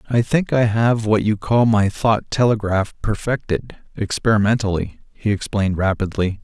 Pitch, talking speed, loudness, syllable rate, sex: 105 Hz, 140 wpm, -19 LUFS, 4.7 syllables/s, male